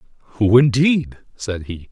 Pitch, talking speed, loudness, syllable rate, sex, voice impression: 115 Hz, 125 wpm, -17 LUFS, 5.4 syllables/s, male, very masculine, very adult-like, middle-aged, thick, tensed, powerful, bright, soft, slightly muffled, fluent, slightly raspy, very cool, very intellectual, slightly refreshing, very sincere, very calm, very mature, very friendly, very reassuring, very unique, elegant, very wild, sweet, lively, kind, slightly modest